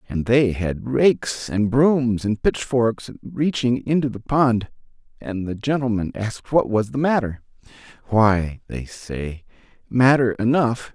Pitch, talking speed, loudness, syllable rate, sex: 115 Hz, 135 wpm, -21 LUFS, 3.9 syllables/s, male